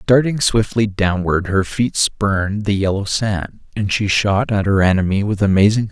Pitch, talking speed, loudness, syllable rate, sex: 100 Hz, 185 wpm, -17 LUFS, 4.8 syllables/s, male